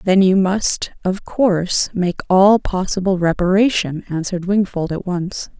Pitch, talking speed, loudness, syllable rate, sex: 185 Hz, 140 wpm, -17 LUFS, 4.4 syllables/s, female